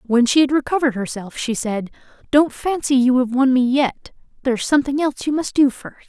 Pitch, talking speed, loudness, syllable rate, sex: 265 Hz, 215 wpm, -18 LUFS, 5.9 syllables/s, female